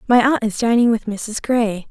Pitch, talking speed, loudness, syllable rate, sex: 225 Hz, 220 wpm, -18 LUFS, 4.8 syllables/s, female